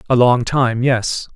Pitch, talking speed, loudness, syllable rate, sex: 125 Hz, 135 wpm, -16 LUFS, 3.6 syllables/s, male